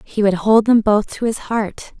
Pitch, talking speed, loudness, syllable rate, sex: 210 Hz, 240 wpm, -17 LUFS, 4.4 syllables/s, female